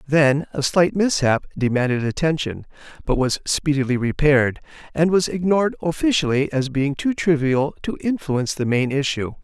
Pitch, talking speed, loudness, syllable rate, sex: 145 Hz, 145 wpm, -20 LUFS, 5.0 syllables/s, male